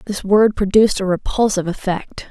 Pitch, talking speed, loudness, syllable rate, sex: 200 Hz, 155 wpm, -17 LUFS, 5.6 syllables/s, female